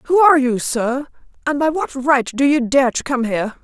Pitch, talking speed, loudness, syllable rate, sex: 265 Hz, 230 wpm, -17 LUFS, 5.0 syllables/s, female